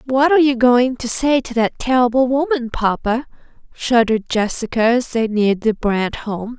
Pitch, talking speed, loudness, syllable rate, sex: 240 Hz, 175 wpm, -17 LUFS, 4.9 syllables/s, female